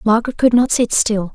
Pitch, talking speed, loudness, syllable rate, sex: 225 Hz, 225 wpm, -15 LUFS, 5.7 syllables/s, female